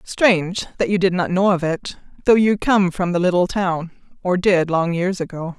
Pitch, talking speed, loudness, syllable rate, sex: 180 Hz, 205 wpm, -19 LUFS, 4.8 syllables/s, female